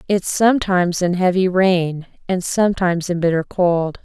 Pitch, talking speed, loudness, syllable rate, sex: 180 Hz, 150 wpm, -18 LUFS, 5.0 syllables/s, female